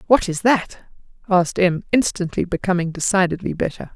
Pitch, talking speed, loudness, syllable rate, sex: 185 Hz, 135 wpm, -20 LUFS, 5.4 syllables/s, female